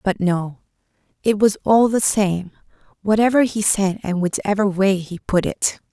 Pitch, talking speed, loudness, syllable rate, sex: 195 Hz, 160 wpm, -19 LUFS, 4.4 syllables/s, female